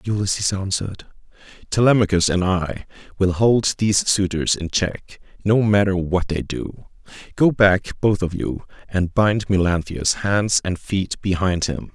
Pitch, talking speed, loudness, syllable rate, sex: 95 Hz, 145 wpm, -20 LUFS, 4.3 syllables/s, male